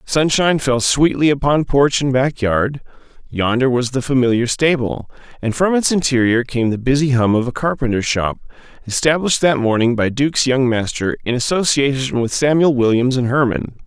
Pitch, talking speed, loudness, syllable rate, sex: 130 Hz, 165 wpm, -16 LUFS, 5.2 syllables/s, male